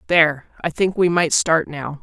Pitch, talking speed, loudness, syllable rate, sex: 160 Hz, 205 wpm, -18 LUFS, 4.8 syllables/s, female